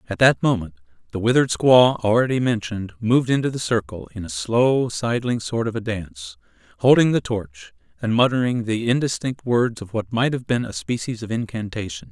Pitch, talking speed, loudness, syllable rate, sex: 110 Hz, 185 wpm, -21 LUFS, 5.4 syllables/s, male